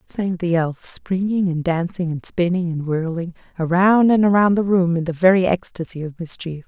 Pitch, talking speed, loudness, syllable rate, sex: 175 Hz, 190 wpm, -19 LUFS, 5.0 syllables/s, female